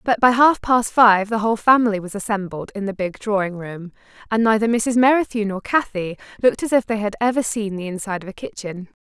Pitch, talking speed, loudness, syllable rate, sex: 215 Hz, 220 wpm, -19 LUFS, 5.9 syllables/s, female